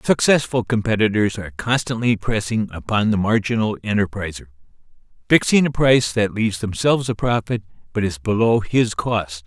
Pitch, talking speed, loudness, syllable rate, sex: 110 Hz, 140 wpm, -19 LUFS, 5.4 syllables/s, male